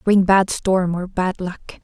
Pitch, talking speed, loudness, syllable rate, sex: 185 Hz, 195 wpm, -19 LUFS, 3.5 syllables/s, female